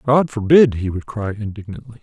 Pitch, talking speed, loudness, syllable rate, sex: 115 Hz, 180 wpm, -18 LUFS, 5.2 syllables/s, male